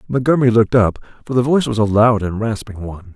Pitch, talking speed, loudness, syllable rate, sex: 110 Hz, 230 wpm, -16 LUFS, 7.0 syllables/s, male